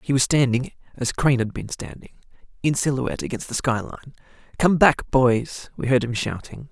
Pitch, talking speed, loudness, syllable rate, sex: 130 Hz, 190 wpm, -22 LUFS, 5.5 syllables/s, male